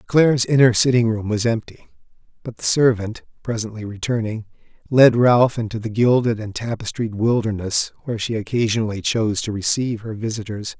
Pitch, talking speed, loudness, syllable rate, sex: 110 Hz, 150 wpm, -19 LUFS, 5.6 syllables/s, male